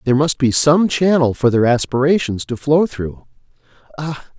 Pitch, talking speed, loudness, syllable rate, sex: 140 Hz, 165 wpm, -16 LUFS, 5.0 syllables/s, male